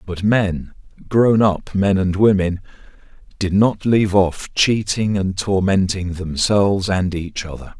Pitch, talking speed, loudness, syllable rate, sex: 95 Hz, 140 wpm, -18 LUFS, 4.0 syllables/s, male